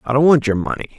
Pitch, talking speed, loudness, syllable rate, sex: 125 Hz, 305 wpm, -16 LUFS, 7.4 syllables/s, male